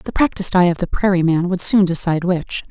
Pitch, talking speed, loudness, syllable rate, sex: 180 Hz, 245 wpm, -17 LUFS, 6.1 syllables/s, female